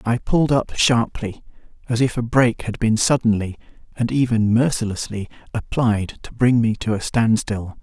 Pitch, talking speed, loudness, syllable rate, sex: 115 Hz, 155 wpm, -20 LUFS, 4.9 syllables/s, male